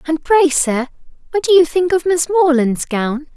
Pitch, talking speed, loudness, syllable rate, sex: 315 Hz, 195 wpm, -15 LUFS, 4.4 syllables/s, female